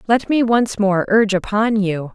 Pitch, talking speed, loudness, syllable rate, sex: 210 Hz, 195 wpm, -17 LUFS, 4.6 syllables/s, female